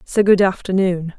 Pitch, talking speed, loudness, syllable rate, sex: 185 Hz, 150 wpm, -17 LUFS, 4.6 syllables/s, female